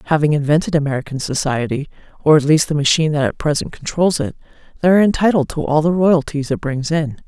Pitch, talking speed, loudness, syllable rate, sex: 155 Hz, 200 wpm, -17 LUFS, 6.5 syllables/s, female